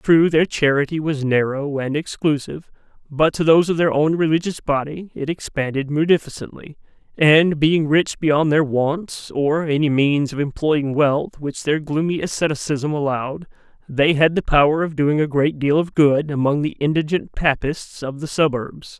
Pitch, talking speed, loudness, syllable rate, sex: 150 Hz, 165 wpm, -19 LUFS, 4.7 syllables/s, male